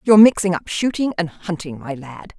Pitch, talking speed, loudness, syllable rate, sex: 180 Hz, 200 wpm, -19 LUFS, 5.5 syllables/s, female